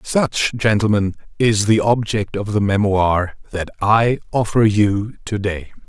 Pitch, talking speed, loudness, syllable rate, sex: 105 Hz, 145 wpm, -18 LUFS, 3.8 syllables/s, male